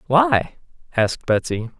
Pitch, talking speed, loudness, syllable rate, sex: 145 Hz, 100 wpm, -20 LUFS, 4.2 syllables/s, male